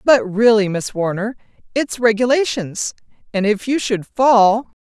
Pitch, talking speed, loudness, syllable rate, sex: 220 Hz, 135 wpm, -17 LUFS, 4.2 syllables/s, female